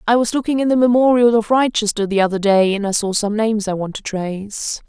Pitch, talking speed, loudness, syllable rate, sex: 215 Hz, 245 wpm, -17 LUFS, 6.0 syllables/s, female